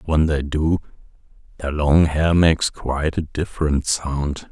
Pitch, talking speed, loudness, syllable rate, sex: 75 Hz, 160 wpm, -20 LUFS, 4.4 syllables/s, male